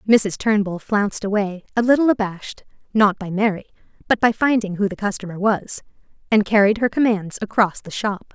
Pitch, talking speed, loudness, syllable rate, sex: 205 Hz, 175 wpm, -20 LUFS, 5.4 syllables/s, female